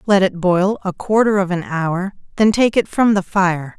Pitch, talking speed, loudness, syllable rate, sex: 190 Hz, 220 wpm, -17 LUFS, 4.4 syllables/s, female